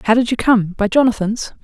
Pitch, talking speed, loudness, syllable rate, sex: 225 Hz, 220 wpm, -16 LUFS, 5.8 syllables/s, female